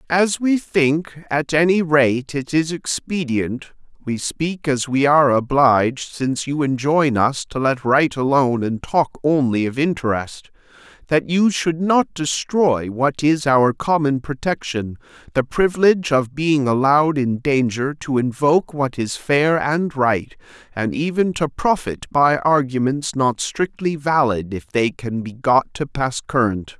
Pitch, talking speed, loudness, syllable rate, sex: 140 Hz, 150 wpm, -19 LUFS, 4.1 syllables/s, male